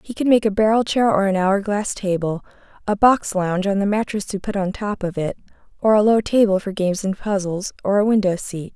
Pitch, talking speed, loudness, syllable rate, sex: 200 Hz, 240 wpm, -19 LUFS, 5.6 syllables/s, female